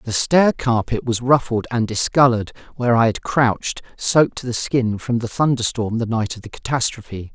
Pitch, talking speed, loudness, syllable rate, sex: 120 Hz, 190 wpm, -19 LUFS, 5.3 syllables/s, male